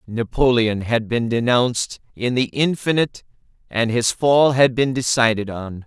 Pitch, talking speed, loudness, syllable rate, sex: 120 Hz, 145 wpm, -19 LUFS, 4.5 syllables/s, male